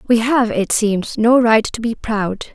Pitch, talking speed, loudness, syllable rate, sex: 225 Hz, 210 wpm, -16 LUFS, 3.9 syllables/s, female